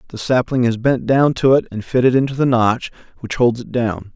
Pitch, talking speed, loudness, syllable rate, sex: 125 Hz, 230 wpm, -17 LUFS, 5.3 syllables/s, male